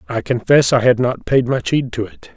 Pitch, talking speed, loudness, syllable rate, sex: 125 Hz, 255 wpm, -16 LUFS, 5.1 syllables/s, male